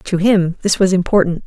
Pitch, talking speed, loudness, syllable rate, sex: 185 Hz, 205 wpm, -15 LUFS, 5.1 syllables/s, female